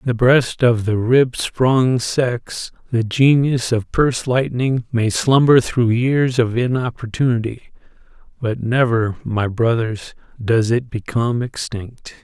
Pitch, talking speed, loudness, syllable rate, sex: 120 Hz, 130 wpm, -18 LUFS, 3.9 syllables/s, male